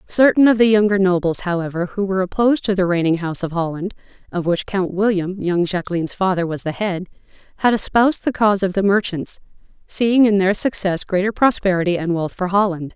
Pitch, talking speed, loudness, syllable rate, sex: 190 Hz, 195 wpm, -18 LUFS, 6.0 syllables/s, female